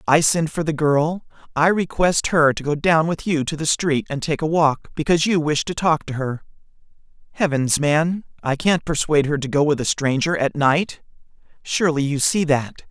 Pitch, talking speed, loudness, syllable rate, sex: 155 Hz, 205 wpm, -20 LUFS, 5.0 syllables/s, male